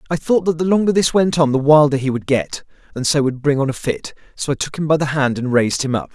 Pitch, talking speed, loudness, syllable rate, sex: 145 Hz, 305 wpm, -17 LUFS, 6.3 syllables/s, male